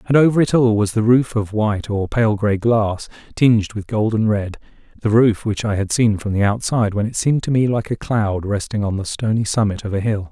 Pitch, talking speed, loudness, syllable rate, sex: 110 Hz, 240 wpm, -18 LUFS, 5.5 syllables/s, male